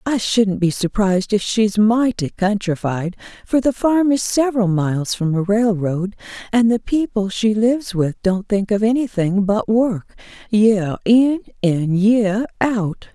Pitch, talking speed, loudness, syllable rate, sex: 210 Hz, 155 wpm, -18 LUFS, 4.1 syllables/s, female